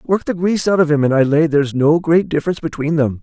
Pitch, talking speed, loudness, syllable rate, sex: 155 Hz, 280 wpm, -16 LUFS, 6.6 syllables/s, male